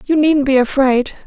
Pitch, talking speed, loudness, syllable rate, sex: 275 Hz, 190 wpm, -14 LUFS, 4.7 syllables/s, female